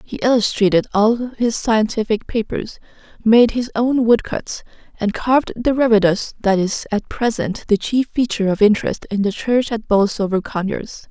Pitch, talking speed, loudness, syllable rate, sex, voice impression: 220 Hz, 155 wpm, -18 LUFS, 4.7 syllables/s, female, very feminine, adult-like, thin, very tensed, slightly powerful, bright, slightly hard, clear, fluent, slightly raspy, cute, very intellectual, refreshing, sincere, slightly calm, friendly, reassuring, unique, elegant, slightly wild, sweet, lively, kind, intense, slightly sharp, slightly modest